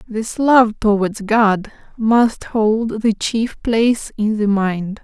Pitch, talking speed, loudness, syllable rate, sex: 220 Hz, 145 wpm, -17 LUFS, 3.1 syllables/s, female